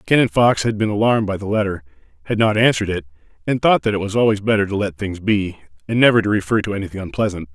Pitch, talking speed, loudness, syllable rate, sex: 105 Hz, 240 wpm, -18 LUFS, 7.1 syllables/s, male